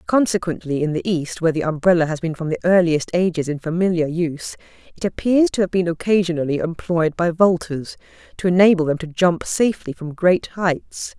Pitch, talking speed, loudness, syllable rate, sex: 170 Hz, 180 wpm, -19 LUFS, 5.5 syllables/s, female